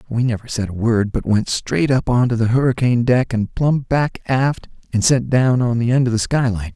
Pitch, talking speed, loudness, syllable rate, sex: 120 Hz, 240 wpm, -18 LUFS, 5.1 syllables/s, male